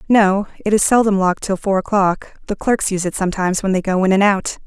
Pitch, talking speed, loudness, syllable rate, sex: 195 Hz, 245 wpm, -17 LUFS, 6.3 syllables/s, female